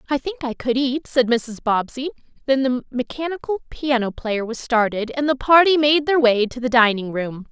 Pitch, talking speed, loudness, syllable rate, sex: 255 Hz, 200 wpm, -20 LUFS, 4.9 syllables/s, female